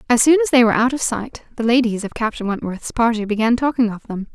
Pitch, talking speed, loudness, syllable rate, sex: 235 Hz, 250 wpm, -18 LUFS, 6.2 syllables/s, female